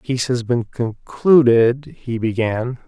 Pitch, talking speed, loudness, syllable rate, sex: 120 Hz, 125 wpm, -18 LUFS, 3.7 syllables/s, male